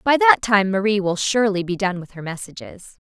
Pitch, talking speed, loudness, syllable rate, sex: 190 Hz, 210 wpm, -19 LUFS, 5.4 syllables/s, female